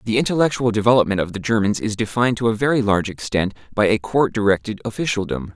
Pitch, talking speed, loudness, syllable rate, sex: 110 Hz, 195 wpm, -19 LUFS, 6.7 syllables/s, male